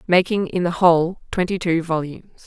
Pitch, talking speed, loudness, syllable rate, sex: 175 Hz, 170 wpm, -20 LUFS, 5.4 syllables/s, female